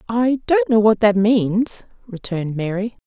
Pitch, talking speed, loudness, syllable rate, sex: 210 Hz, 155 wpm, -18 LUFS, 4.3 syllables/s, female